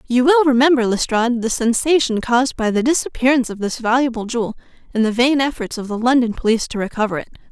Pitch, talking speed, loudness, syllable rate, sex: 240 Hz, 200 wpm, -17 LUFS, 6.6 syllables/s, female